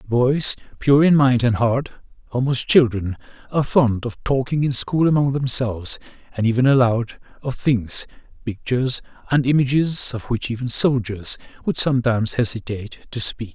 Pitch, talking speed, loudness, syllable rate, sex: 125 Hz, 145 wpm, -20 LUFS, 5.0 syllables/s, male